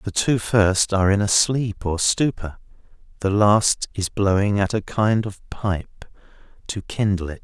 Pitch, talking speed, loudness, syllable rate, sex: 100 Hz, 170 wpm, -20 LUFS, 4.1 syllables/s, male